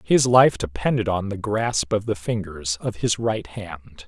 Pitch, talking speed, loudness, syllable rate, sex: 100 Hz, 190 wpm, -22 LUFS, 4.3 syllables/s, male